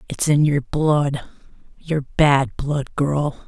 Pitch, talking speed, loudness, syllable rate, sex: 145 Hz, 140 wpm, -20 LUFS, 3.0 syllables/s, female